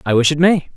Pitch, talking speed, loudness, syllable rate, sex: 155 Hz, 315 wpm, -14 LUFS, 6.5 syllables/s, male